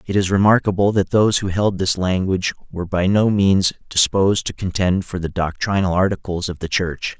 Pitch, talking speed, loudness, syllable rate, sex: 95 Hz, 190 wpm, -18 LUFS, 5.5 syllables/s, male